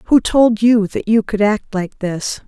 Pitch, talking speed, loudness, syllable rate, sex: 215 Hz, 220 wpm, -16 LUFS, 3.8 syllables/s, female